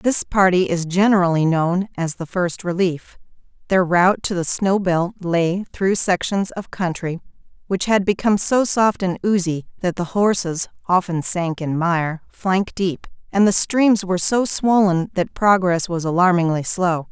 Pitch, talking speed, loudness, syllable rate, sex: 185 Hz, 165 wpm, -19 LUFS, 4.3 syllables/s, female